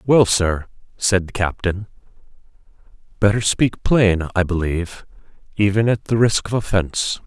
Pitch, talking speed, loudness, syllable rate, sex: 100 Hz, 130 wpm, -19 LUFS, 4.6 syllables/s, male